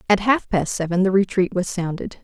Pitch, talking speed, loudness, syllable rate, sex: 190 Hz, 215 wpm, -20 LUFS, 5.4 syllables/s, female